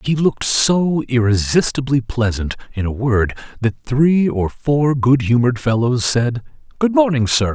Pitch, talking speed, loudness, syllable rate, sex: 130 Hz, 150 wpm, -17 LUFS, 4.4 syllables/s, male